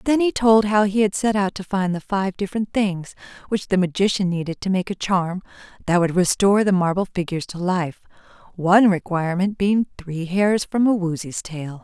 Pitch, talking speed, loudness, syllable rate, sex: 190 Hz, 200 wpm, -20 LUFS, 5.3 syllables/s, female